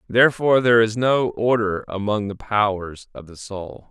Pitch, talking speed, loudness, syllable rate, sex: 110 Hz, 170 wpm, -19 LUFS, 4.9 syllables/s, male